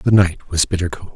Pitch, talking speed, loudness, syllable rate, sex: 90 Hz, 260 wpm, -18 LUFS, 6.0 syllables/s, male